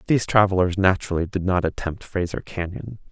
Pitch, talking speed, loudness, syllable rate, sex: 95 Hz, 155 wpm, -22 LUFS, 6.1 syllables/s, male